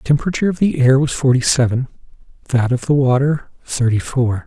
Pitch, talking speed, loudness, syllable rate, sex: 130 Hz, 175 wpm, -16 LUFS, 6.0 syllables/s, male